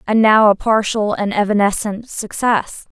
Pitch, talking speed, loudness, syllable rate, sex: 210 Hz, 140 wpm, -16 LUFS, 4.4 syllables/s, female